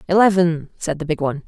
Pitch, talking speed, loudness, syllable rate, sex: 165 Hz, 205 wpm, -19 LUFS, 6.6 syllables/s, female